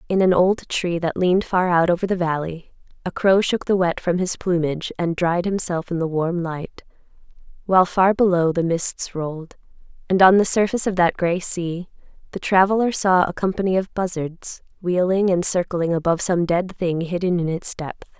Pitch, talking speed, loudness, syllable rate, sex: 180 Hz, 190 wpm, -20 LUFS, 5.1 syllables/s, female